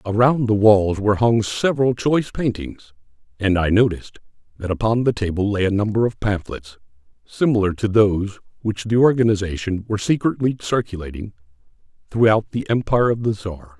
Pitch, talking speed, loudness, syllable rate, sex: 105 Hz, 150 wpm, -19 LUFS, 5.8 syllables/s, male